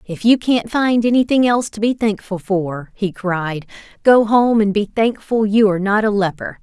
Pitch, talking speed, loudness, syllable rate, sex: 210 Hz, 200 wpm, -17 LUFS, 4.8 syllables/s, female